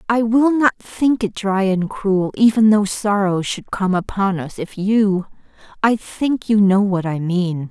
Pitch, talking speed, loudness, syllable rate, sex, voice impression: 200 Hz, 185 wpm, -18 LUFS, 4.0 syllables/s, female, feminine, adult-like, tensed, powerful, clear, slightly halting, intellectual, calm, friendly, slightly reassuring, elegant, lively, slightly sharp